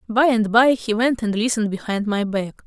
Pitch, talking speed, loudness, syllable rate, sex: 220 Hz, 225 wpm, -20 LUFS, 5.3 syllables/s, female